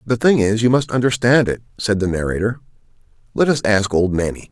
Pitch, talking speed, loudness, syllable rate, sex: 110 Hz, 200 wpm, -17 LUFS, 5.7 syllables/s, male